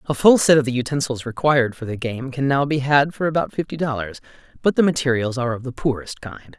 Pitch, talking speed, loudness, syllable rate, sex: 135 Hz, 235 wpm, -20 LUFS, 6.1 syllables/s, male